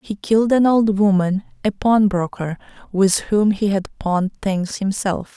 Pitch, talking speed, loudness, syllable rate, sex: 200 Hz, 155 wpm, -19 LUFS, 4.4 syllables/s, female